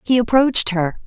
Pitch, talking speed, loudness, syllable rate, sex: 225 Hz, 170 wpm, -16 LUFS, 5.6 syllables/s, female